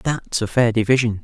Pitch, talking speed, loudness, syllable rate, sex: 115 Hz, 195 wpm, -19 LUFS, 5.0 syllables/s, male